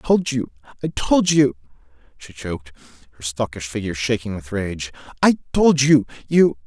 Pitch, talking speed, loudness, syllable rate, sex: 120 Hz, 145 wpm, -20 LUFS, 5.2 syllables/s, male